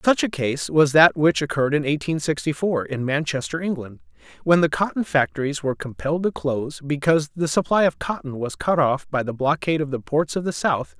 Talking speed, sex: 235 wpm, male